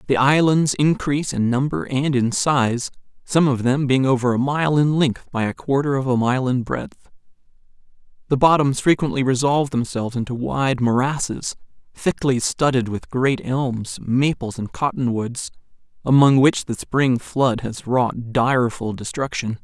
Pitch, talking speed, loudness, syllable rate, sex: 130 Hz, 155 wpm, -20 LUFS, 4.5 syllables/s, male